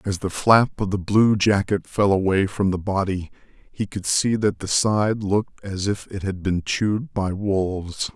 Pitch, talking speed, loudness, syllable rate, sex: 100 Hz, 200 wpm, -22 LUFS, 4.3 syllables/s, male